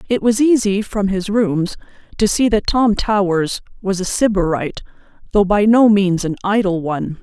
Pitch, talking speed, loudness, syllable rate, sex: 200 Hz, 175 wpm, -16 LUFS, 4.9 syllables/s, female